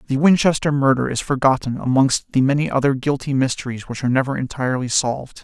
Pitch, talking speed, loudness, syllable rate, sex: 135 Hz, 175 wpm, -19 LUFS, 6.3 syllables/s, male